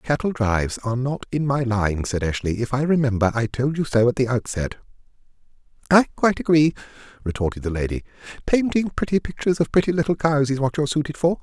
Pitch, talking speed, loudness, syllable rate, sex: 135 Hz, 195 wpm, -22 LUFS, 6.2 syllables/s, male